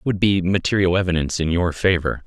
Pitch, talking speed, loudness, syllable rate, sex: 90 Hz, 210 wpm, -19 LUFS, 6.3 syllables/s, male